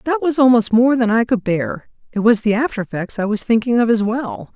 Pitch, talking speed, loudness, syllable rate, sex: 225 Hz, 250 wpm, -17 LUFS, 5.5 syllables/s, female